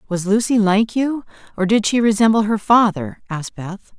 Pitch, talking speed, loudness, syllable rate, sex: 210 Hz, 180 wpm, -17 LUFS, 5.0 syllables/s, female